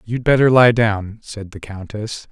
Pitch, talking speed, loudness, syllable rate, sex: 110 Hz, 180 wpm, -15 LUFS, 4.1 syllables/s, male